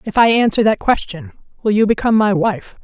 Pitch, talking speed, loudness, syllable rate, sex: 215 Hz, 210 wpm, -15 LUFS, 5.8 syllables/s, female